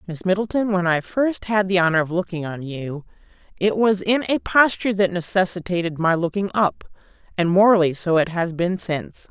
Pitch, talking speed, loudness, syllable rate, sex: 185 Hz, 185 wpm, -20 LUFS, 5.3 syllables/s, female